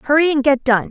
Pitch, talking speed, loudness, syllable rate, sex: 275 Hz, 265 wpm, -15 LUFS, 5.8 syllables/s, female